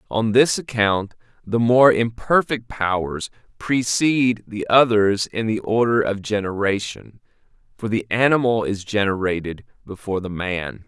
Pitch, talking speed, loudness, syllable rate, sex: 110 Hz, 125 wpm, -20 LUFS, 4.4 syllables/s, male